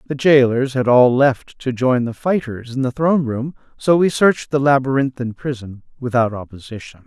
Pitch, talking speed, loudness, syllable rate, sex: 130 Hz, 180 wpm, -17 LUFS, 5.3 syllables/s, male